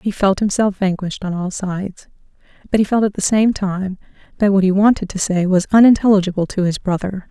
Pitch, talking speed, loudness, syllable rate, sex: 195 Hz, 205 wpm, -17 LUFS, 5.8 syllables/s, female